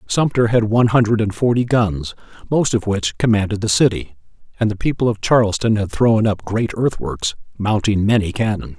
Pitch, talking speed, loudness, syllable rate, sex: 105 Hz, 180 wpm, -18 LUFS, 5.3 syllables/s, male